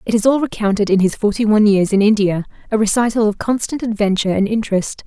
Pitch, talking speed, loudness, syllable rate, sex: 210 Hz, 200 wpm, -16 LUFS, 6.7 syllables/s, female